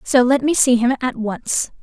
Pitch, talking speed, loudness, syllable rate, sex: 250 Hz, 230 wpm, -17 LUFS, 4.4 syllables/s, female